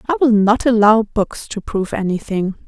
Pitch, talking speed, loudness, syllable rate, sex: 210 Hz, 180 wpm, -16 LUFS, 5.1 syllables/s, female